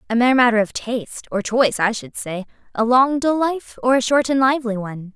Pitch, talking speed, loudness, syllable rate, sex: 240 Hz, 220 wpm, -19 LUFS, 5.9 syllables/s, female